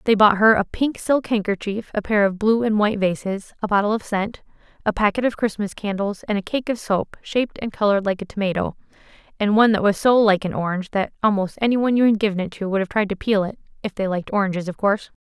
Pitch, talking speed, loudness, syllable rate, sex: 205 Hz, 245 wpm, -21 LUFS, 6.5 syllables/s, female